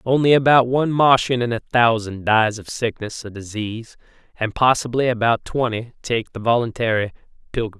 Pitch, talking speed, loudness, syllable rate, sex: 120 Hz, 155 wpm, -19 LUFS, 5.6 syllables/s, male